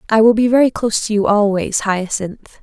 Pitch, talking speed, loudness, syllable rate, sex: 215 Hz, 205 wpm, -15 LUFS, 5.4 syllables/s, female